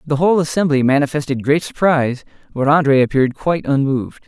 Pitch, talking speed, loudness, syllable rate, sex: 145 Hz, 155 wpm, -16 LUFS, 6.5 syllables/s, male